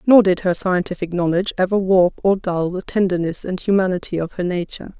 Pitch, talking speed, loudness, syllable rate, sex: 185 Hz, 190 wpm, -19 LUFS, 5.9 syllables/s, female